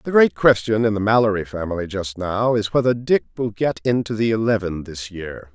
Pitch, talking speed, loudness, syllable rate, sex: 105 Hz, 205 wpm, -20 LUFS, 5.3 syllables/s, male